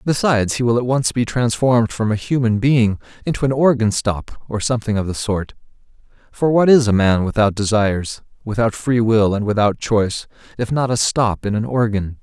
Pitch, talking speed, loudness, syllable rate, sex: 115 Hz, 195 wpm, -18 LUFS, 5.3 syllables/s, male